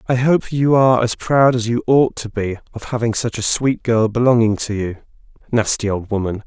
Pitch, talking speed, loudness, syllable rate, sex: 115 Hz, 215 wpm, -17 LUFS, 5.2 syllables/s, male